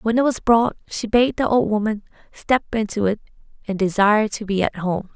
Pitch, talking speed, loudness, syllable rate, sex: 215 Hz, 210 wpm, -20 LUFS, 5.2 syllables/s, female